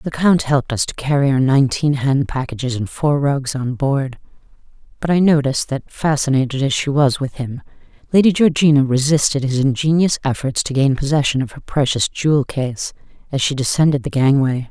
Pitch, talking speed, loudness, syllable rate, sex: 140 Hz, 180 wpm, -17 LUFS, 5.4 syllables/s, female